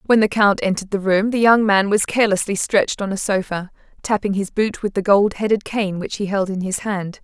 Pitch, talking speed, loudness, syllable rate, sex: 200 Hz, 240 wpm, -19 LUFS, 5.6 syllables/s, female